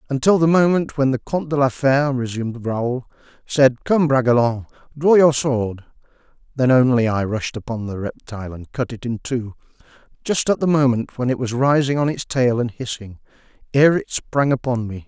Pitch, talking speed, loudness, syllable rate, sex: 130 Hz, 185 wpm, -19 LUFS, 5.2 syllables/s, male